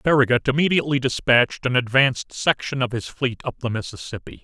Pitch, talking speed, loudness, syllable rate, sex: 130 Hz, 160 wpm, -21 LUFS, 6.0 syllables/s, male